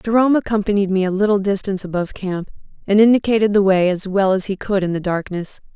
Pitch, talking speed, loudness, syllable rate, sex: 195 Hz, 210 wpm, -18 LUFS, 6.5 syllables/s, female